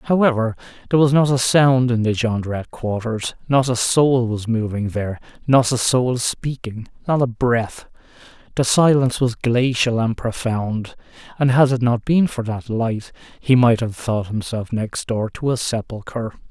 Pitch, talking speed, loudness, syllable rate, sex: 120 Hz, 170 wpm, -19 LUFS, 4.5 syllables/s, male